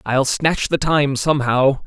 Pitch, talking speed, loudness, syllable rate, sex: 140 Hz, 160 wpm, -17 LUFS, 4.0 syllables/s, male